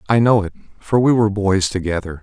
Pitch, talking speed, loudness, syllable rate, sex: 100 Hz, 215 wpm, -17 LUFS, 6.1 syllables/s, male